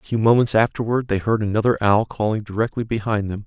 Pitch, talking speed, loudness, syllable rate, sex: 110 Hz, 210 wpm, -20 LUFS, 6.3 syllables/s, male